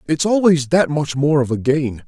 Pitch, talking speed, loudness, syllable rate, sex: 150 Hz, 230 wpm, -17 LUFS, 4.7 syllables/s, male